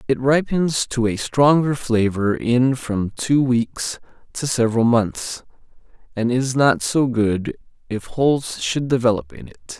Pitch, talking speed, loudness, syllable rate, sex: 120 Hz, 145 wpm, -19 LUFS, 3.9 syllables/s, male